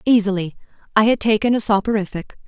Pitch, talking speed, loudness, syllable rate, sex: 210 Hz, 145 wpm, -18 LUFS, 6.4 syllables/s, female